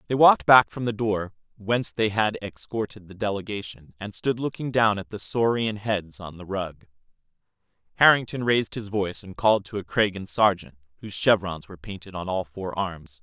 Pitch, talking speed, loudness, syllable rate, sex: 100 Hz, 185 wpm, -24 LUFS, 5.4 syllables/s, male